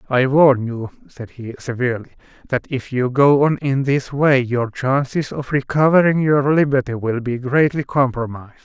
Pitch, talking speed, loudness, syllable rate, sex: 130 Hz, 165 wpm, -18 LUFS, 4.8 syllables/s, male